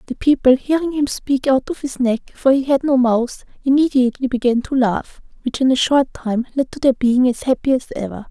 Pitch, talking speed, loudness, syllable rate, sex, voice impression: 260 Hz, 225 wpm, -17 LUFS, 5.1 syllables/s, female, feminine, slightly young, slightly weak, soft, slightly halting, friendly, reassuring, kind, modest